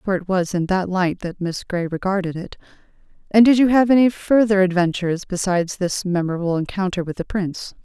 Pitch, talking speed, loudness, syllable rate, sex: 185 Hz, 190 wpm, -19 LUFS, 5.8 syllables/s, female